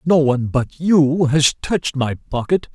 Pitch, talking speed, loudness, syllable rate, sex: 145 Hz, 175 wpm, -18 LUFS, 4.3 syllables/s, male